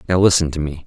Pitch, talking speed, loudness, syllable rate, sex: 80 Hz, 280 wpm, -17 LUFS, 7.3 syllables/s, male